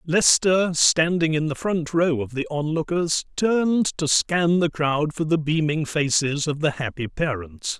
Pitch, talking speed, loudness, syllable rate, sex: 155 Hz, 170 wpm, -22 LUFS, 4.1 syllables/s, male